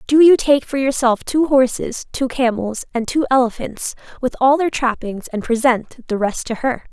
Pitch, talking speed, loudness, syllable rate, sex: 250 Hz, 190 wpm, -18 LUFS, 4.6 syllables/s, female